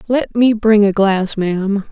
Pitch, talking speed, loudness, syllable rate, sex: 210 Hz, 190 wpm, -14 LUFS, 4.1 syllables/s, female